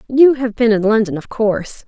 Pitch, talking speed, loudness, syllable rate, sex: 225 Hz, 225 wpm, -15 LUFS, 5.3 syllables/s, female